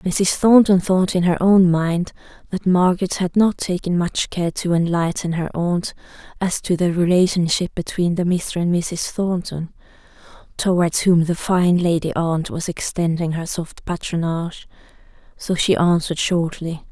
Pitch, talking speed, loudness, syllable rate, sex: 175 Hz, 155 wpm, -19 LUFS, 4.4 syllables/s, female